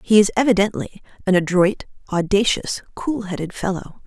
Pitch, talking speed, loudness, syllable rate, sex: 195 Hz, 135 wpm, -20 LUFS, 5.1 syllables/s, female